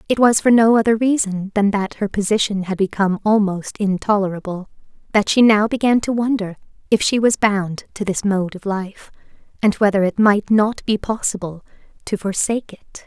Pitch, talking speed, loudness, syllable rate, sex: 205 Hz, 180 wpm, -18 LUFS, 5.1 syllables/s, female